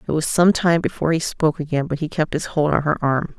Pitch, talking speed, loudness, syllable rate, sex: 155 Hz, 285 wpm, -20 LUFS, 6.2 syllables/s, female